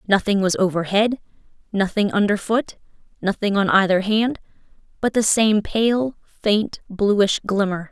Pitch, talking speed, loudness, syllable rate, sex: 205 Hz, 130 wpm, -20 LUFS, 4.1 syllables/s, female